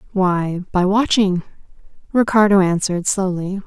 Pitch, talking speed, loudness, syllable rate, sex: 190 Hz, 100 wpm, -17 LUFS, 4.7 syllables/s, female